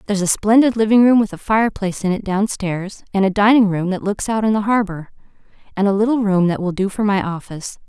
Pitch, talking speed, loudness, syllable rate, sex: 200 Hz, 235 wpm, -17 LUFS, 6.2 syllables/s, female